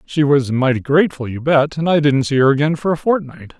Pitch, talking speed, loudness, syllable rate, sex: 145 Hz, 250 wpm, -16 LUFS, 6.1 syllables/s, male